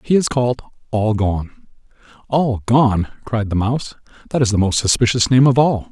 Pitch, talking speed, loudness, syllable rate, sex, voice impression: 115 Hz, 180 wpm, -17 LUFS, 5.2 syllables/s, male, masculine, adult-like, slightly thick, slightly muffled, cool, sincere, slightly elegant